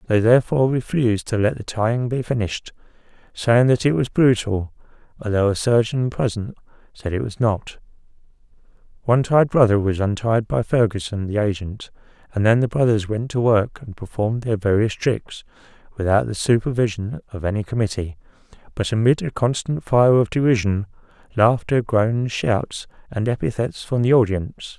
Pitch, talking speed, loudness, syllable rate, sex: 115 Hz, 155 wpm, -20 LUFS, 5.2 syllables/s, male